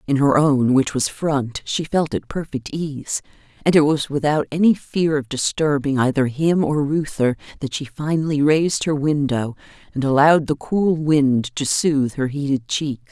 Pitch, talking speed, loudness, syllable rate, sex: 145 Hz, 180 wpm, -19 LUFS, 4.6 syllables/s, female